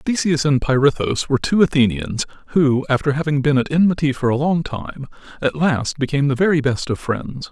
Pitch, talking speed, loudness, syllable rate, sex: 140 Hz, 190 wpm, -18 LUFS, 5.5 syllables/s, male